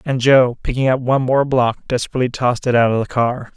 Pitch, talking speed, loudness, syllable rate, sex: 125 Hz, 235 wpm, -17 LUFS, 6.2 syllables/s, male